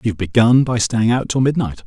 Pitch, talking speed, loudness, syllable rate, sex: 115 Hz, 225 wpm, -16 LUFS, 5.7 syllables/s, male